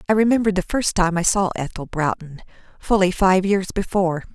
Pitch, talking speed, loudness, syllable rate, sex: 185 Hz, 180 wpm, -20 LUFS, 5.8 syllables/s, female